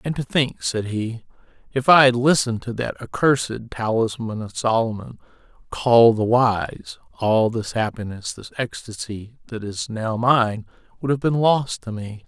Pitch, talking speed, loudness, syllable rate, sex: 115 Hz, 160 wpm, -21 LUFS, 4.4 syllables/s, male